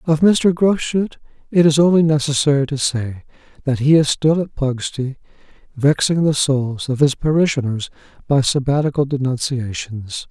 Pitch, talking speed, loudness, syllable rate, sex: 140 Hz, 140 wpm, -17 LUFS, 4.7 syllables/s, male